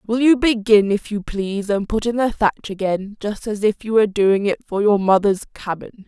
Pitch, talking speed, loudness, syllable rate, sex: 210 Hz, 225 wpm, -19 LUFS, 4.9 syllables/s, female